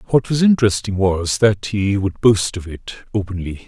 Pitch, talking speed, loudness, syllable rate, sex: 100 Hz, 180 wpm, -18 LUFS, 4.8 syllables/s, male